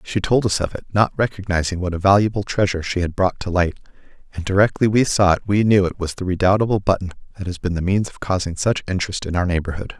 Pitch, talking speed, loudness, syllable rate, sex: 95 Hz, 240 wpm, -20 LUFS, 6.5 syllables/s, male